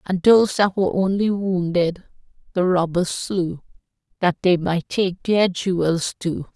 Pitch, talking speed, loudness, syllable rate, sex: 180 Hz, 145 wpm, -20 LUFS, 4.2 syllables/s, female